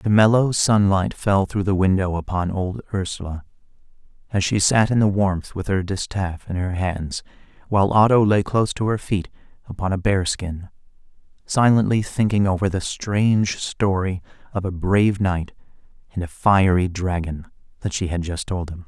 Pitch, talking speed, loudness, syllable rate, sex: 95 Hz, 170 wpm, -21 LUFS, 4.9 syllables/s, male